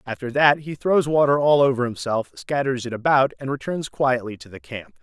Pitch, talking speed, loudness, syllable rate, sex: 130 Hz, 205 wpm, -21 LUFS, 5.2 syllables/s, male